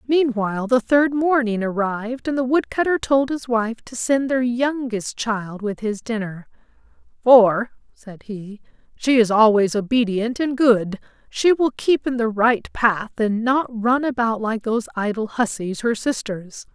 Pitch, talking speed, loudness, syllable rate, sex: 235 Hz, 160 wpm, -20 LUFS, 4.2 syllables/s, female